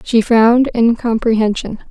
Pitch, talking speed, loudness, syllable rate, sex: 230 Hz, 95 wpm, -14 LUFS, 4.8 syllables/s, female